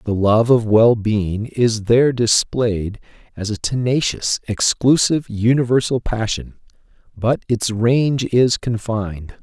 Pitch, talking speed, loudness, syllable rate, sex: 115 Hz, 115 wpm, -17 LUFS, 4.0 syllables/s, male